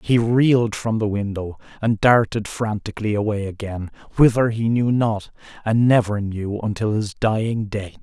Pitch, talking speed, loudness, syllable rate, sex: 110 Hz, 155 wpm, -20 LUFS, 4.8 syllables/s, male